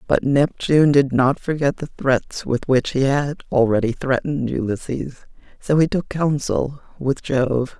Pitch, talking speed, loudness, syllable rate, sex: 135 Hz, 155 wpm, -20 LUFS, 4.4 syllables/s, female